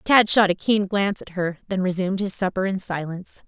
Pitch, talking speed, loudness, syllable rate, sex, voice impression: 190 Hz, 225 wpm, -22 LUFS, 5.9 syllables/s, female, feminine, young, tensed, slightly powerful, clear, intellectual, sharp